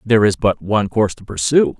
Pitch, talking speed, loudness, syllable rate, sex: 110 Hz, 235 wpm, -17 LUFS, 6.5 syllables/s, male